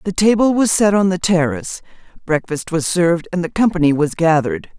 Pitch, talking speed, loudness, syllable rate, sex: 175 Hz, 190 wpm, -16 LUFS, 5.7 syllables/s, female